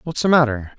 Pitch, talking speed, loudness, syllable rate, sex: 135 Hz, 230 wpm, -17 LUFS, 5.9 syllables/s, male